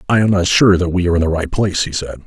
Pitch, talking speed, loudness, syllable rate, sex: 90 Hz, 345 wpm, -15 LUFS, 7.3 syllables/s, male